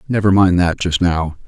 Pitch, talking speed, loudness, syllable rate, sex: 90 Hz, 205 wpm, -15 LUFS, 4.8 syllables/s, male